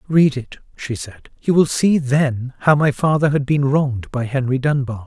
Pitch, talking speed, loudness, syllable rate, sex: 135 Hz, 200 wpm, -18 LUFS, 4.6 syllables/s, male